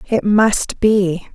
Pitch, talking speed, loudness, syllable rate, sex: 200 Hz, 135 wpm, -15 LUFS, 2.8 syllables/s, female